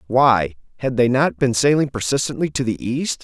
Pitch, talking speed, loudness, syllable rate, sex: 125 Hz, 185 wpm, -19 LUFS, 5.0 syllables/s, male